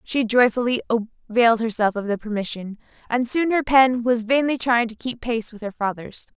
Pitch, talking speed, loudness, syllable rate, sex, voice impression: 235 Hz, 190 wpm, -21 LUFS, 5.4 syllables/s, female, feminine, adult-like, tensed, powerful, bright, clear, fluent, friendly, lively, slightly intense, slightly light